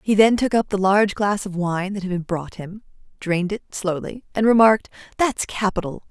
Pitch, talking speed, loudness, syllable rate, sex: 195 Hz, 205 wpm, -21 LUFS, 5.4 syllables/s, female